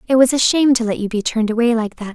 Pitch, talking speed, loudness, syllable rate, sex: 235 Hz, 335 wpm, -16 LUFS, 7.4 syllables/s, female